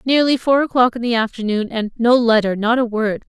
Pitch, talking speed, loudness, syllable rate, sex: 235 Hz, 195 wpm, -17 LUFS, 5.5 syllables/s, female